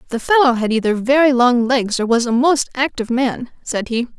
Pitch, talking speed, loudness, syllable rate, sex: 250 Hz, 215 wpm, -16 LUFS, 5.4 syllables/s, female